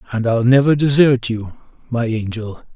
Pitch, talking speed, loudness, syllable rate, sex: 120 Hz, 155 wpm, -16 LUFS, 4.7 syllables/s, male